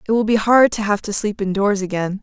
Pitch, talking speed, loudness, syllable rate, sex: 205 Hz, 270 wpm, -17 LUFS, 5.8 syllables/s, female